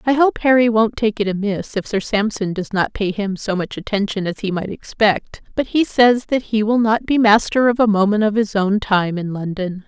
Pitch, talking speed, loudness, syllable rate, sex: 210 Hz, 235 wpm, -18 LUFS, 5.0 syllables/s, female